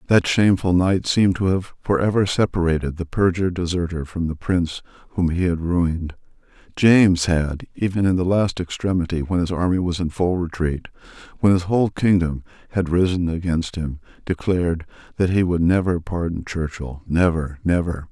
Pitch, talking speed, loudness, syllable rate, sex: 85 Hz, 165 wpm, -21 LUFS, 5.3 syllables/s, male